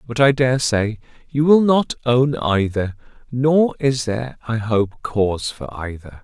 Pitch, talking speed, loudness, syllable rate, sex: 120 Hz, 155 wpm, -19 LUFS, 4.0 syllables/s, male